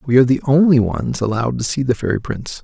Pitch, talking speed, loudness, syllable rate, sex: 125 Hz, 250 wpm, -17 LUFS, 6.6 syllables/s, male